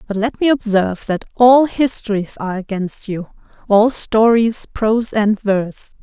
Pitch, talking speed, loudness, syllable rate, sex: 215 Hz, 140 wpm, -16 LUFS, 4.5 syllables/s, female